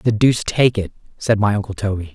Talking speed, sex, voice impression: 225 wpm, male, very masculine, slightly young, slightly adult-like, very thick, very tensed, very powerful, slightly dark, hard, slightly muffled, fluent, very cool, intellectual, sincere, very calm, mature, friendly, reassuring, very unique, very wild, slightly sweet, slightly lively, very kind, slightly modest